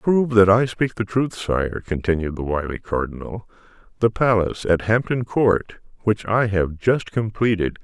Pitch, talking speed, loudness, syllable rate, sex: 105 Hz, 170 wpm, -21 LUFS, 4.6 syllables/s, male